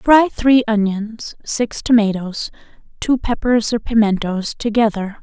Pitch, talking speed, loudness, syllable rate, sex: 225 Hz, 115 wpm, -17 LUFS, 4.0 syllables/s, female